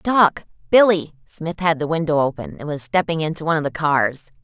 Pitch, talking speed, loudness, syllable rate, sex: 160 Hz, 205 wpm, -19 LUFS, 5.4 syllables/s, female